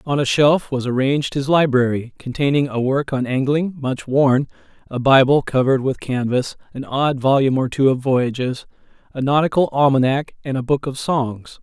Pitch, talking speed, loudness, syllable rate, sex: 135 Hz, 175 wpm, -18 LUFS, 5.0 syllables/s, male